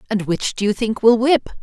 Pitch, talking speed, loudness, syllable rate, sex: 225 Hz, 260 wpm, -18 LUFS, 5.2 syllables/s, female